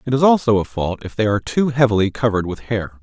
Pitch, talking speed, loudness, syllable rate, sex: 115 Hz, 260 wpm, -18 LUFS, 6.6 syllables/s, male